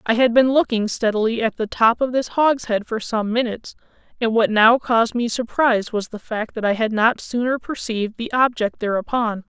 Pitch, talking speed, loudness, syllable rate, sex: 230 Hz, 200 wpm, -20 LUFS, 5.3 syllables/s, female